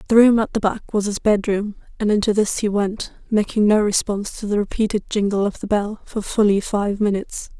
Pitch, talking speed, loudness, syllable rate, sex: 205 Hz, 215 wpm, -20 LUFS, 5.5 syllables/s, female